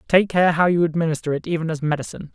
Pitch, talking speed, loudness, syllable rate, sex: 165 Hz, 230 wpm, -20 LUFS, 7.3 syllables/s, male